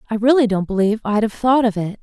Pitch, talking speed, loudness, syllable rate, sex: 220 Hz, 265 wpm, -17 LUFS, 6.8 syllables/s, female